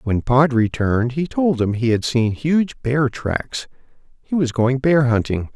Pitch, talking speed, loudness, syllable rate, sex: 130 Hz, 185 wpm, -19 LUFS, 4.1 syllables/s, male